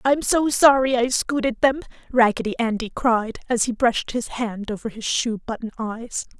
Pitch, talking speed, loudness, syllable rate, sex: 235 Hz, 180 wpm, -21 LUFS, 4.8 syllables/s, female